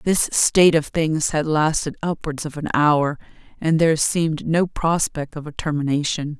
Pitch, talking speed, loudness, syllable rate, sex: 155 Hz, 170 wpm, -20 LUFS, 4.7 syllables/s, female